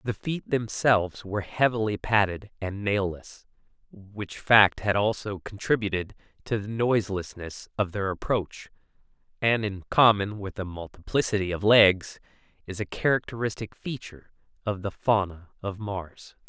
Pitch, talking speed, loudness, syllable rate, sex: 105 Hz, 130 wpm, -26 LUFS, 4.6 syllables/s, male